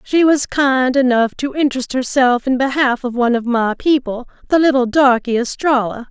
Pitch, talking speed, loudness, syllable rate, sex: 255 Hz, 175 wpm, -15 LUFS, 5.0 syllables/s, female